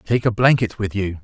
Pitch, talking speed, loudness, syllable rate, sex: 105 Hz, 245 wpm, -19 LUFS, 5.3 syllables/s, male